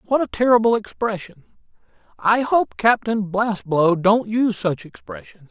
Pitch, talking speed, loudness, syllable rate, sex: 195 Hz, 130 wpm, -19 LUFS, 4.6 syllables/s, male